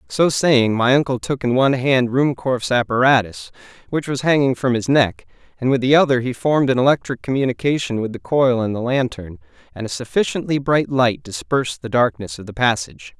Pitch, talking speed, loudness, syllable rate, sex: 125 Hz, 190 wpm, -18 LUFS, 5.5 syllables/s, male